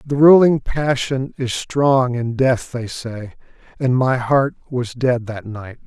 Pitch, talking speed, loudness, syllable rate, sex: 130 Hz, 165 wpm, -18 LUFS, 3.6 syllables/s, male